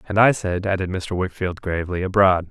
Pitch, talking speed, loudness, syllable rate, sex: 95 Hz, 190 wpm, -21 LUFS, 5.6 syllables/s, male